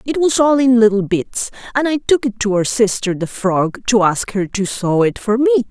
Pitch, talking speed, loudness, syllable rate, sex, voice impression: 225 Hz, 240 wpm, -16 LUFS, 4.9 syllables/s, female, feminine, adult-like, slightly powerful, clear, slightly refreshing, friendly, lively